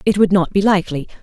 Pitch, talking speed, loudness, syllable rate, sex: 190 Hz, 245 wpm, -15 LUFS, 7.1 syllables/s, female